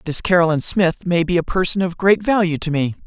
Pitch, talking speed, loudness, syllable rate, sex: 175 Hz, 235 wpm, -18 LUFS, 6.0 syllables/s, male